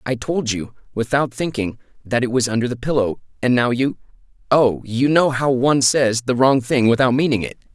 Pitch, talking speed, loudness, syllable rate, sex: 125 Hz, 200 wpm, -18 LUFS, 5.2 syllables/s, male